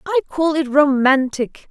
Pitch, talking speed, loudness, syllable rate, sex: 290 Hz, 140 wpm, -17 LUFS, 4.2 syllables/s, female